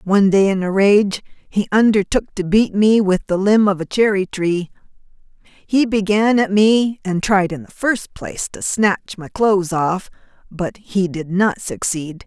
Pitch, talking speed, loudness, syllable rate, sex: 195 Hz, 180 wpm, -17 LUFS, 4.1 syllables/s, female